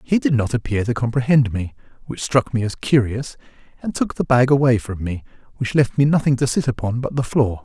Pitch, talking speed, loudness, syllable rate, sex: 125 Hz, 230 wpm, -19 LUFS, 5.6 syllables/s, male